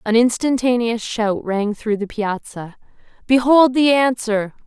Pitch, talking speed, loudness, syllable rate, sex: 230 Hz, 130 wpm, -18 LUFS, 4.0 syllables/s, female